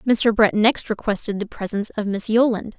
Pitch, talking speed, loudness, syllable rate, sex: 215 Hz, 195 wpm, -20 LUFS, 5.4 syllables/s, female